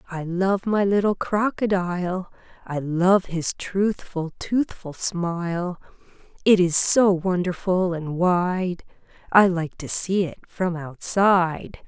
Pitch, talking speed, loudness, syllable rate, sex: 180 Hz, 115 wpm, -22 LUFS, 3.5 syllables/s, female